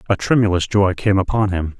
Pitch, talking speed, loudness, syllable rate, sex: 95 Hz, 200 wpm, -17 LUFS, 5.7 syllables/s, male